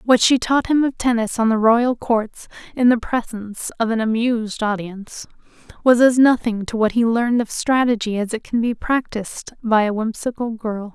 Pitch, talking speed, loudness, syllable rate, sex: 230 Hz, 190 wpm, -19 LUFS, 5.1 syllables/s, female